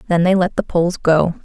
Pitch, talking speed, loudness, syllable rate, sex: 175 Hz, 250 wpm, -16 LUFS, 5.9 syllables/s, female